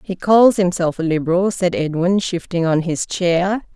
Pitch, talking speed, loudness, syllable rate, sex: 180 Hz, 175 wpm, -17 LUFS, 4.5 syllables/s, female